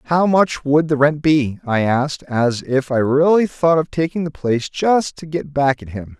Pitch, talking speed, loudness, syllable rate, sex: 145 Hz, 225 wpm, -17 LUFS, 4.6 syllables/s, male